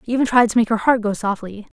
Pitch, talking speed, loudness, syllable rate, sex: 225 Hz, 305 wpm, -18 LUFS, 7.1 syllables/s, female